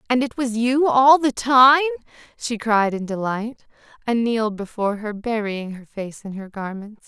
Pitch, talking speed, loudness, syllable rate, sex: 230 Hz, 180 wpm, -20 LUFS, 4.6 syllables/s, female